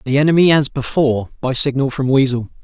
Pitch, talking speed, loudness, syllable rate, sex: 135 Hz, 180 wpm, -16 LUFS, 6.3 syllables/s, male